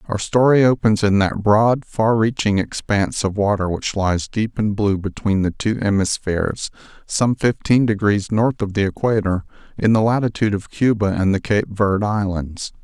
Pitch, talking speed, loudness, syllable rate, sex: 105 Hz, 175 wpm, -19 LUFS, 4.8 syllables/s, male